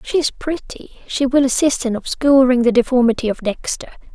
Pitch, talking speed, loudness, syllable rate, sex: 255 Hz, 175 wpm, -17 LUFS, 5.4 syllables/s, female